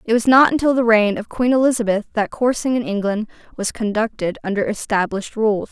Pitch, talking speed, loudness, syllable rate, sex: 225 Hz, 190 wpm, -18 LUFS, 5.8 syllables/s, female